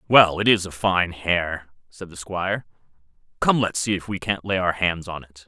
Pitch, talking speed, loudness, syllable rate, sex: 90 Hz, 220 wpm, -22 LUFS, 4.9 syllables/s, male